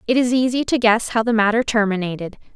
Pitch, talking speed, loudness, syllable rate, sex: 225 Hz, 210 wpm, -18 LUFS, 6.2 syllables/s, female